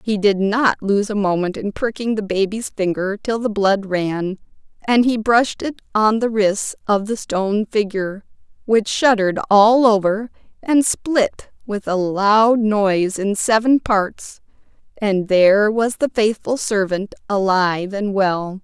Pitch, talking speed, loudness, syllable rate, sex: 210 Hz, 155 wpm, -18 LUFS, 4.2 syllables/s, female